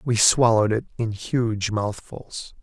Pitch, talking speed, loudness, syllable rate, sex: 110 Hz, 135 wpm, -22 LUFS, 3.8 syllables/s, male